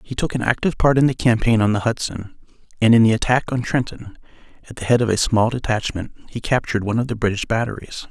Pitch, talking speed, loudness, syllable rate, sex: 115 Hz, 230 wpm, -19 LUFS, 6.5 syllables/s, male